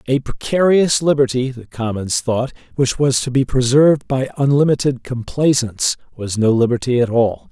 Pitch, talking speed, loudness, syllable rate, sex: 130 Hz, 150 wpm, -17 LUFS, 4.9 syllables/s, male